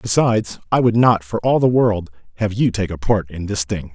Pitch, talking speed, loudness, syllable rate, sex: 100 Hz, 245 wpm, -18 LUFS, 5.2 syllables/s, male